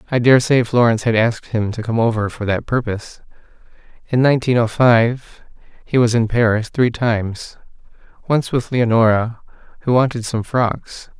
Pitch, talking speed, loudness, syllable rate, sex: 115 Hz, 150 wpm, -17 LUFS, 5.2 syllables/s, male